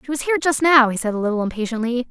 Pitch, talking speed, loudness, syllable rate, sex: 255 Hz, 285 wpm, -18 LUFS, 7.5 syllables/s, female